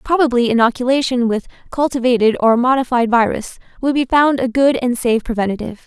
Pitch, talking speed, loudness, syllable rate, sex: 245 Hz, 155 wpm, -16 LUFS, 6.0 syllables/s, female